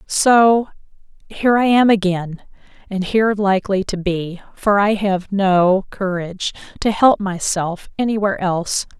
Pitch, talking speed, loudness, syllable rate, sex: 195 Hz, 140 wpm, -17 LUFS, 4.4 syllables/s, female